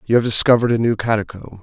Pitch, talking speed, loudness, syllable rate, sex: 115 Hz, 220 wpm, -17 LUFS, 7.4 syllables/s, male